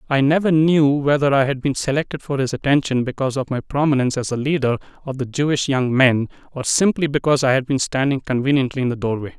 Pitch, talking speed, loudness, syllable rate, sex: 135 Hz, 215 wpm, -19 LUFS, 6.4 syllables/s, male